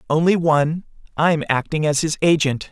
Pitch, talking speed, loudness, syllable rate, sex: 155 Hz, 155 wpm, -19 LUFS, 5.1 syllables/s, male